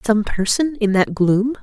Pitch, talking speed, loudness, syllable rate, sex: 220 Hz, 185 wpm, -18 LUFS, 4.2 syllables/s, female